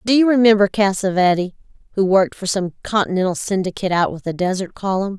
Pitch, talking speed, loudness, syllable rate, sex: 195 Hz, 175 wpm, -18 LUFS, 6.3 syllables/s, female